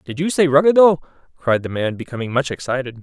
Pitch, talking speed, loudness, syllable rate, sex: 140 Hz, 200 wpm, -18 LUFS, 6.3 syllables/s, male